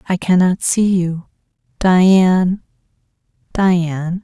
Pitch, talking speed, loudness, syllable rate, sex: 180 Hz, 85 wpm, -15 LUFS, 3.4 syllables/s, female